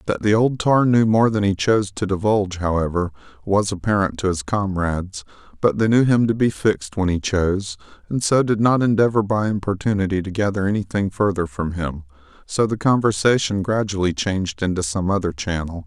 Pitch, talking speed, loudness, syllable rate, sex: 100 Hz, 185 wpm, -20 LUFS, 5.5 syllables/s, male